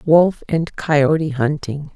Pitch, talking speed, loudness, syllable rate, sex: 155 Hz, 125 wpm, -18 LUFS, 3.4 syllables/s, female